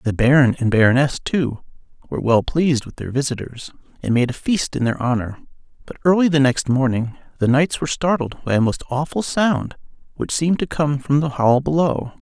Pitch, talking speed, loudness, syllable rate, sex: 135 Hz, 195 wpm, -19 LUFS, 5.4 syllables/s, male